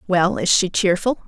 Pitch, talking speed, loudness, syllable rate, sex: 195 Hz, 190 wpm, -18 LUFS, 4.6 syllables/s, female